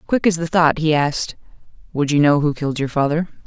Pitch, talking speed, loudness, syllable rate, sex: 155 Hz, 225 wpm, -18 LUFS, 6.2 syllables/s, female